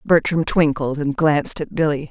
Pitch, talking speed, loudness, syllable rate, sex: 150 Hz, 170 wpm, -19 LUFS, 5.0 syllables/s, female